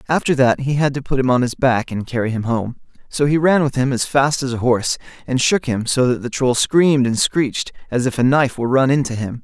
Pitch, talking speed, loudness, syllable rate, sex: 130 Hz, 265 wpm, -18 LUFS, 5.9 syllables/s, male